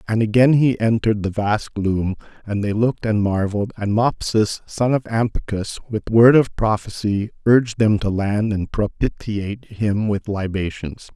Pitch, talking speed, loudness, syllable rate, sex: 105 Hz, 160 wpm, -19 LUFS, 4.6 syllables/s, male